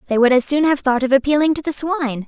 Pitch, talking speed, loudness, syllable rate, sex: 275 Hz, 290 wpm, -17 LUFS, 6.7 syllables/s, female